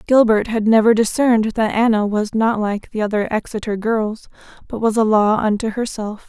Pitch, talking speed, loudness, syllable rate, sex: 220 Hz, 180 wpm, -17 LUFS, 5.1 syllables/s, female